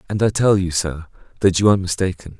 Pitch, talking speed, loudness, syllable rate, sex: 95 Hz, 225 wpm, -18 LUFS, 6.4 syllables/s, male